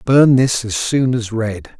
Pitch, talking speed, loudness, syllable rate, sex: 120 Hz, 200 wpm, -16 LUFS, 3.8 syllables/s, male